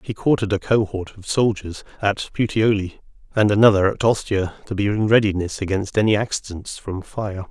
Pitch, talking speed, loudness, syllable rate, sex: 105 Hz, 170 wpm, -20 LUFS, 5.4 syllables/s, male